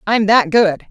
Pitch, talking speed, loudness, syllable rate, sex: 205 Hz, 200 wpm, -13 LUFS, 3.9 syllables/s, female